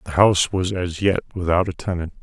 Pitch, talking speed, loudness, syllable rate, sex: 90 Hz, 215 wpm, -21 LUFS, 5.9 syllables/s, male